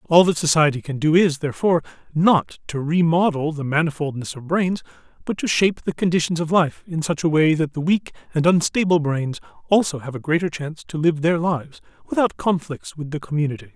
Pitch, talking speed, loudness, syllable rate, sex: 160 Hz, 195 wpm, -21 LUFS, 5.8 syllables/s, male